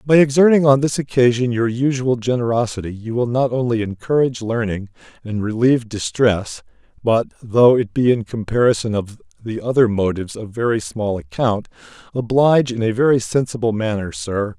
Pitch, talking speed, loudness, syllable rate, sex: 120 Hz, 155 wpm, -18 LUFS, 4.5 syllables/s, male